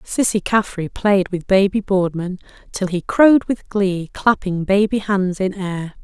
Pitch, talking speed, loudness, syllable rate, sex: 195 Hz, 160 wpm, -18 LUFS, 4.1 syllables/s, female